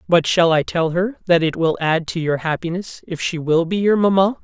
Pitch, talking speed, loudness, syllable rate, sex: 175 Hz, 245 wpm, -18 LUFS, 5.1 syllables/s, female